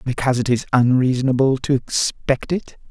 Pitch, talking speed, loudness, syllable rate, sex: 130 Hz, 145 wpm, -19 LUFS, 5.3 syllables/s, male